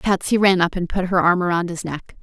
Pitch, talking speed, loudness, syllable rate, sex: 180 Hz, 270 wpm, -19 LUFS, 5.6 syllables/s, female